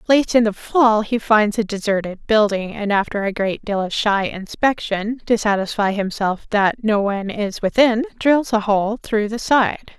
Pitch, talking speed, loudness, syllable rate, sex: 215 Hz, 185 wpm, -19 LUFS, 4.4 syllables/s, female